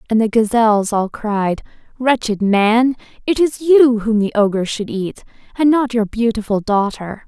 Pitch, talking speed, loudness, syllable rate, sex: 225 Hz, 165 wpm, -16 LUFS, 4.5 syllables/s, female